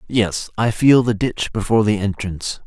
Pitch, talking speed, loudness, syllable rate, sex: 110 Hz, 180 wpm, -18 LUFS, 5.1 syllables/s, male